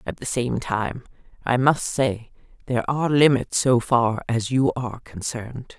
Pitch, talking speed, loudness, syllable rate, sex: 125 Hz, 165 wpm, -22 LUFS, 4.7 syllables/s, female